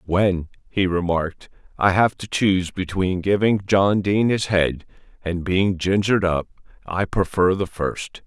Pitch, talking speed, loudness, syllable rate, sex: 95 Hz, 150 wpm, -21 LUFS, 4.3 syllables/s, male